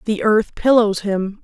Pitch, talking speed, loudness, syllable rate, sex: 210 Hz, 165 wpm, -17 LUFS, 3.9 syllables/s, female